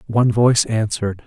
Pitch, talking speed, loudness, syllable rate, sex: 110 Hz, 145 wpm, -17 LUFS, 6.4 syllables/s, male